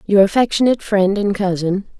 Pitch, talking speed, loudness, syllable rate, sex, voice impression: 200 Hz, 150 wpm, -16 LUFS, 5.7 syllables/s, female, feminine, gender-neutral, very adult-like, middle-aged, slightly thin, slightly relaxed, slightly weak, slightly bright, soft, very clear, very fluent, slightly cute, cool, very intellectual, refreshing, sincere, calm, friendly, reassuring, unique, very elegant, very sweet, lively, kind, slightly modest, light